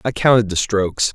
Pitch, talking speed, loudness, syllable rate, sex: 110 Hz, 210 wpm, -17 LUFS, 5.8 syllables/s, male